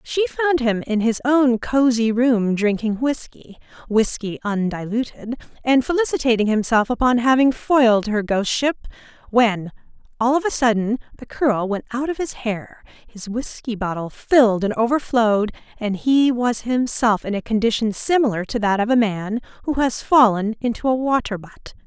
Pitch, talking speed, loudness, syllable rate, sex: 235 Hz, 155 wpm, -20 LUFS, 4.8 syllables/s, female